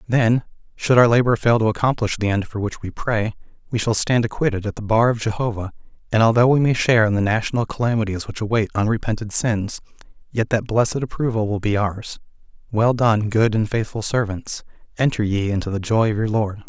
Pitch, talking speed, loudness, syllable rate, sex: 110 Hz, 200 wpm, -20 LUFS, 5.8 syllables/s, male